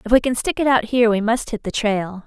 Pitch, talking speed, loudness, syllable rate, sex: 230 Hz, 320 wpm, -19 LUFS, 6.0 syllables/s, female